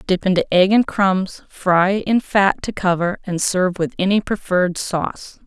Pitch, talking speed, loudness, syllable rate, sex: 190 Hz, 175 wpm, -18 LUFS, 4.5 syllables/s, female